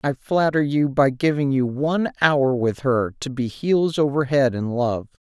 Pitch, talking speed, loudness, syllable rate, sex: 140 Hz, 195 wpm, -21 LUFS, 4.3 syllables/s, male